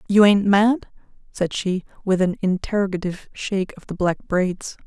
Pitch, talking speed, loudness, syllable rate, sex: 190 Hz, 160 wpm, -21 LUFS, 4.8 syllables/s, female